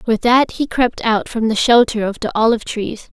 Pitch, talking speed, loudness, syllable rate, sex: 230 Hz, 225 wpm, -16 LUFS, 5.1 syllables/s, female